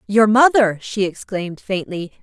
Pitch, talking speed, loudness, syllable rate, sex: 205 Hz, 135 wpm, -17 LUFS, 4.6 syllables/s, female